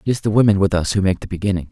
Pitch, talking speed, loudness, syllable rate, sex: 100 Hz, 350 wpm, -18 LUFS, 7.8 syllables/s, male